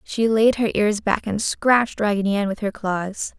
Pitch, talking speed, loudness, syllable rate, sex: 210 Hz, 215 wpm, -21 LUFS, 4.6 syllables/s, female